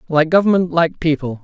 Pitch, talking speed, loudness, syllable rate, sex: 160 Hz, 165 wpm, -16 LUFS, 5.6 syllables/s, male